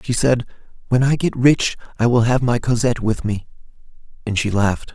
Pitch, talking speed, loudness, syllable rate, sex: 120 Hz, 195 wpm, -19 LUFS, 5.6 syllables/s, male